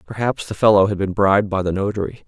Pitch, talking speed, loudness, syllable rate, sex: 100 Hz, 240 wpm, -18 LUFS, 6.6 syllables/s, male